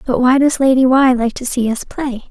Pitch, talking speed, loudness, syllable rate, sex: 255 Hz, 260 wpm, -14 LUFS, 5.2 syllables/s, female